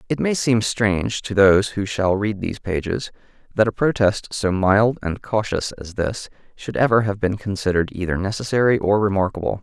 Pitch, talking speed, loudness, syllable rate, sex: 105 Hz, 180 wpm, -20 LUFS, 5.3 syllables/s, male